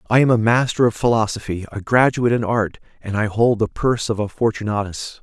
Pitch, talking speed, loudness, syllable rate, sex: 110 Hz, 205 wpm, -19 LUFS, 6.0 syllables/s, male